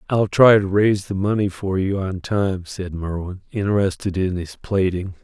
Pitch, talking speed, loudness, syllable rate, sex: 95 Hz, 185 wpm, -20 LUFS, 4.7 syllables/s, male